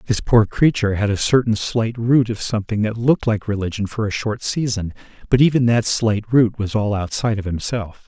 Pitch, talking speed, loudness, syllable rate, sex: 110 Hz, 210 wpm, -19 LUFS, 5.4 syllables/s, male